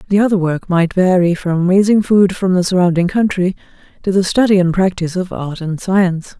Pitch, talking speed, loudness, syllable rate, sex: 185 Hz, 195 wpm, -14 LUFS, 5.5 syllables/s, female